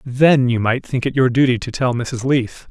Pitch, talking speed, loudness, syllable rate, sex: 125 Hz, 245 wpm, -17 LUFS, 4.6 syllables/s, male